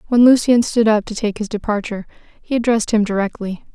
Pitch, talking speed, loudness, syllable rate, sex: 215 Hz, 190 wpm, -17 LUFS, 6.2 syllables/s, female